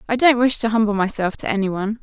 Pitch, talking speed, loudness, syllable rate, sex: 220 Hz, 265 wpm, -19 LUFS, 7.0 syllables/s, female